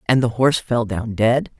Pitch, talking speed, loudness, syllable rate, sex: 115 Hz, 225 wpm, -19 LUFS, 5.2 syllables/s, female